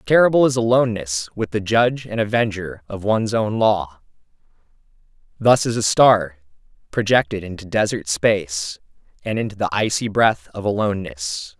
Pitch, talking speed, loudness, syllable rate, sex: 105 Hz, 140 wpm, -19 LUFS, 5.1 syllables/s, male